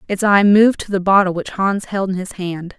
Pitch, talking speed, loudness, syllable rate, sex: 195 Hz, 260 wpm, -16 LUFS, 5.4 syllables/s, female